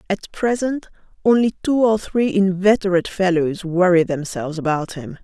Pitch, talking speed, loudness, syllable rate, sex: 190 Hz, 135 wpm, -19 LUFS, 5.0 syllables/s, female